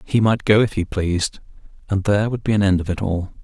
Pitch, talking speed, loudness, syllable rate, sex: 100 Hz, 260 wpm, -19 LUFS, 6.1 syllables/s, male